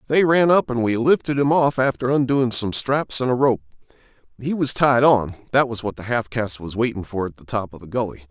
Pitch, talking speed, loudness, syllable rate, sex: 120 Hz, 245 wpm, -20 LUFS, 3.5 syllables/s, male